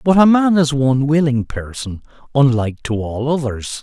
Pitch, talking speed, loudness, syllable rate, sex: 135 Hz, 175 wpm, -16 LUFS, 5.0 syllables/s, male